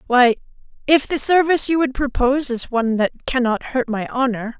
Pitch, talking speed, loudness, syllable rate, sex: 260 Hz, 185 wpm, -18 LUFS, 5.4 syllables/s, female